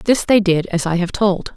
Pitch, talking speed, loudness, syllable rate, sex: 190 Hz, 270 wpm, -17 LUFS, 4.6 syllables/s, female